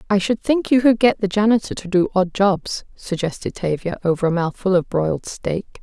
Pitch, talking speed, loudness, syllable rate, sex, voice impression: 190 Hz, 205 wpm, -19 LUFS, 5.3 syllables/s, female, very feminine, very adult-like, thin, slightly tensed, slightly weak, slightly bright, soft, clear, fluent, cool, very intellectual, refreshing, very sincere, calm, friendly, very reassuring, unique, very elegant, slightly wild, sweet, slightly lively, kind, slightly intense